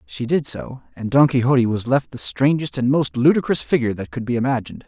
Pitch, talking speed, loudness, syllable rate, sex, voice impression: 125 Hz, 220 wpm, -19 LUFS, 6.1 syllables/s, male, masculine, adult-like, tensed, powerful, bright, clear, fluent, intellectual, friendly, wild, lively, slightly intense, light